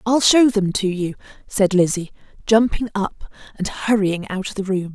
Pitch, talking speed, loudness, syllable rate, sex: 200 Hz, 180 wpm, -19 LUFS, 4.6 syllables/s, female